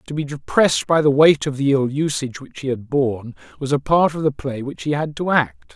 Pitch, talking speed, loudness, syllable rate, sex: 135 Hz, 260 wpm, -19 LUFS, 5.6 syllables/s, male